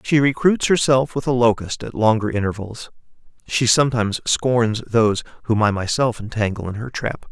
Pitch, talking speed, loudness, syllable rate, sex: 115 Hz, 165 wpm, -19 LUFS, 5.2 syllables/s, male